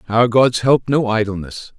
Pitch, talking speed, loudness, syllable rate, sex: 115 Hz, 170 wpm, -16 LUFS, 4.4 syllables/s, male